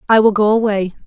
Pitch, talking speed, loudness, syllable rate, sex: 210 Hz, 225 wpm, -14 LUFS, 6.3 syllables/s, female